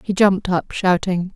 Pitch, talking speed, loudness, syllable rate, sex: 185 Hz, 175 wpm, -19 LUFS, 4.8 syllables/s, female